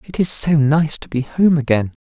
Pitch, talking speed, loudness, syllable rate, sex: 150 Hz, 235 wpm, -16 LUFS, 5.0 syllables/s, male